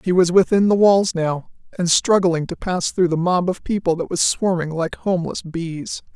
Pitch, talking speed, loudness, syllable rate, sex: 175 Hz, 205 wpm, -19 LUFS, 4.8 syllables/s, female